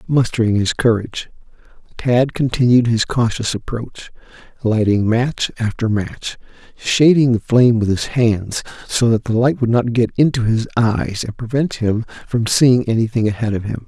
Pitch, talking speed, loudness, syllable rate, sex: 115 Hz, 160 wpm, -17 LUFS, 4.7 syllables/s, male